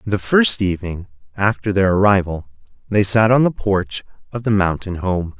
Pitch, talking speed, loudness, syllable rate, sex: 100 Hz, 165 wpm, -17 LUFS, 4.9 syllables/s, male